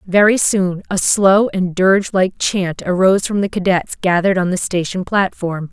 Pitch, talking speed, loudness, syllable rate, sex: 190 Hz, 180 wpm, -16 LUFS, 4.8 syllables/s, female